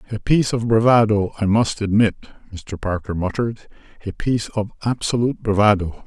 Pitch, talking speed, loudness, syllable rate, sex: 105 Hz, 140 wpm, -19 LUFS, 6.0 syllables/s, male